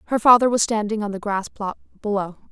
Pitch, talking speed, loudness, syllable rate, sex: 210 Hz, 215 wpm, -20 LUFS, 6.1 syllables/s, female